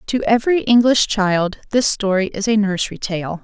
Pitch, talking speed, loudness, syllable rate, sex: 210 Hz, 175 wpm, -17 LUFS, 5.1 syllables/s, female